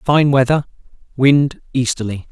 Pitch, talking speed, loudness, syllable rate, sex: 135 Hz, 105 wpm, -16 LUFS, 4.2 syllables/s, male